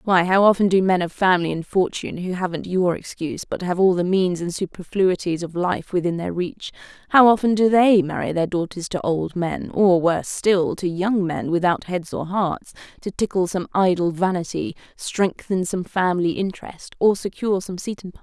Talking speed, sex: 200 wpm, female